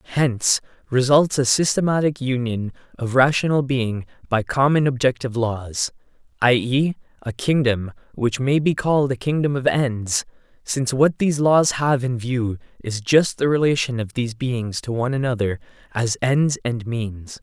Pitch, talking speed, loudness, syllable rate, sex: 130 Hz, 155 wpm, -20 LUFS, 4.7 syllables/s, male